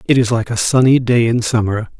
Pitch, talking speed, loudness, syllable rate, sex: 115 Hz, 240 wpm, -14 LUFS, 5.5 syllables/s, male